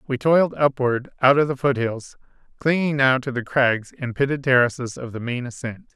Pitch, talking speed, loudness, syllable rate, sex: 130 Hz, 190 wpm, -21 LUFS, 5.2 syllables/s, male